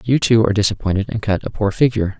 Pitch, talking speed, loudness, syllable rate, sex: 110 Hz, 245 wpm, -17 LUFS, 7.3 syllables/s, male